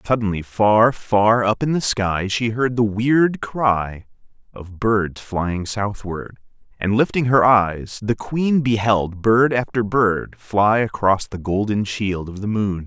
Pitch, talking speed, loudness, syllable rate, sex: 110 Hz, 160 wpm, -19 LUFS, 3.6 syllables/s, male